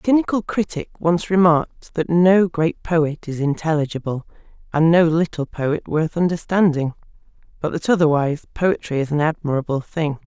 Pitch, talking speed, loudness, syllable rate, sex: 160 Hz, 145 wpm, -20 LUFS, 5.0 syllables/s, female